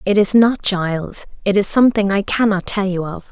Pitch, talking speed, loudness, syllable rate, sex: 200 Hz, 200 wpm, -16 LUFS, 5.4 syllables/s, female